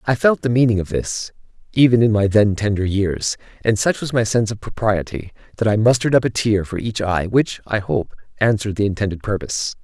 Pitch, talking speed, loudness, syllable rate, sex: 110 Hz, 215 wpm, -19 LUFS, 5.9 syllables/s, male